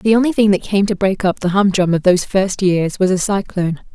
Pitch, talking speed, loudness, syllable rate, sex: 190 Hz, 260 wpm, -16 LUFS, 5.9 syllables/s, female